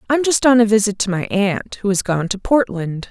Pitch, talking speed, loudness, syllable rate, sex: 215 Hz, 250 wpm, -17 LUFS, 5.2 syllables/s, female